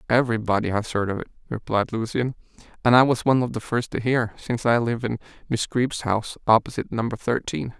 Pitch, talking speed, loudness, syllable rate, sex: 115 Hz, 200 wpm, -23 LUFS, 6.1 syllables/s, male